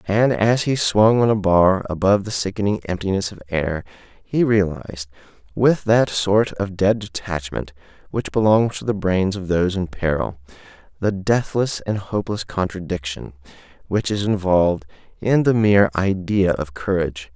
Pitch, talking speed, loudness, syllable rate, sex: 100 Hz, 150 wpm, -20 LUFS, 4.8 syllables/s, male